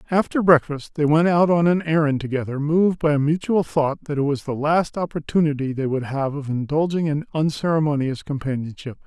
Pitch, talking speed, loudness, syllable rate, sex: 150 Hz, 185 wpm, -21 LUFS, 5.6 syllables/s, male